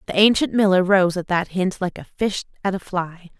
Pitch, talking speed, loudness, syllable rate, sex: 190 Hz, 230 wpm, -20 LUFS, 5.3 syllables/s, female